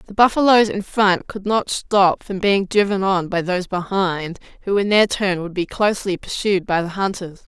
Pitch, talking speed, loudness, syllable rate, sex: 195 Hz, 190 wpm, -19 LUFS, 4.7 syllables/s, female